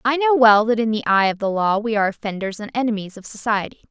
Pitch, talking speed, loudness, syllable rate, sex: 220 Hz, 260 wpm, -19 LUFS, 6.6 syllables/s, female